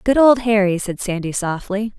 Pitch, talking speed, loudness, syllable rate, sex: 205 Hz, 180 wpm, -18 LUFS, 4.8 syllables/s, female